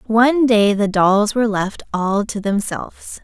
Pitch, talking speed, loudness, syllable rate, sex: 215 Hz, 165 wpm, -17 LUFS, 4.4 syllables/s, female